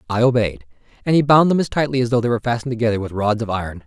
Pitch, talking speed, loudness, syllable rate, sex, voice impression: 120 Hz, 280 wpm, -18 LUFS, 7.9 syllables/s, male, masculine, adult-like, slightly middle-aged, slightly thick, slightly tensed, slightly powerful, very bright, hard, clear, very fluent, slightly raspy, slightly cool, very intellectual, very refreshing, very sincere, slightly calm, slightly mature, friendly, slightly reassuring, very unique, elegant, sweet, kind, slightly sharp, light